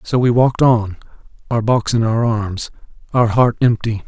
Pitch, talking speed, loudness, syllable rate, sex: 115 Hz, 175 wpm, -16 LUFS, 4.7 syllables/s, male